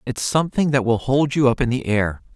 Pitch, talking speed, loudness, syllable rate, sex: 125 Hz, 255 wpm, -20 LUFS, 5.6 syllables/s, male